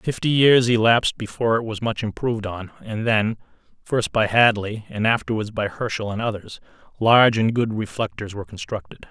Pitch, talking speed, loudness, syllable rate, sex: 110 Hz, 170 wpm, -21 LUFS, 5.5 syllables/s, male